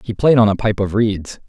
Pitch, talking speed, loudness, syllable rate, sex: 105 Hz, 285 wpm, -16 LUFS, 5.2 syllables/s, male